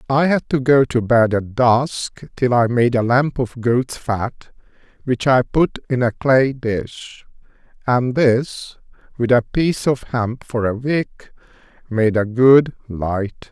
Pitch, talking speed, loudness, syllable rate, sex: 125 Hz, 165 wpm, -18 LUFS, 3.6 syllables/s, male